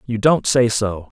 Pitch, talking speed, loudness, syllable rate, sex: 115 Hz, 200 wpm, -17 LUFS, 3.9 syllables/s, male